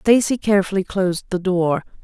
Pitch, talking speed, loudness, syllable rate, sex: 190 Hz, 145 wpm, -19 LUFS, 5.6 syllables/s, female